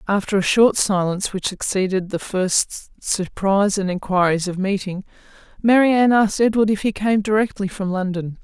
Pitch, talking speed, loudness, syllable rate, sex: 200 Hz, 155 wpm, -19 LUFS, 5.1 syllables/s, female